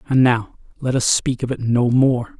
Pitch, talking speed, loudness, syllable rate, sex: 125 Hz, 225 wpm, -18 LUFS, 4.6 syllables/s, male